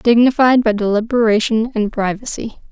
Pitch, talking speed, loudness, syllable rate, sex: 225 Hz, 110 wpm, -15 LUFS, 5.2 syllables/s, female